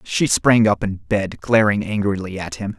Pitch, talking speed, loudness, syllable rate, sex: 105 Hz, 195 wpm, -19 LUFS, 4.5 syllables/s, male